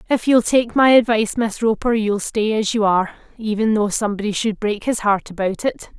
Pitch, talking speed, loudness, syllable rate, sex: 215 Hz, 210 wpm, -18 LUFS, 5.5 syllables/s, female